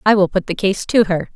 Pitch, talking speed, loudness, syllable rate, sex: 195 Hz, 310 wpm, -17 LUFS, 5.7 syllables/s, female